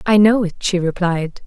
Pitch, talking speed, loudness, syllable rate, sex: 190 Hz, 205 wpm, -17 LUFS, 4.7 syllables/s, female